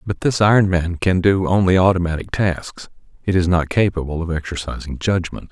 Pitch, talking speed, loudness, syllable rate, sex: 90 Hz, 175 wpm, -18 LUFS, 5.4 syllables/s, male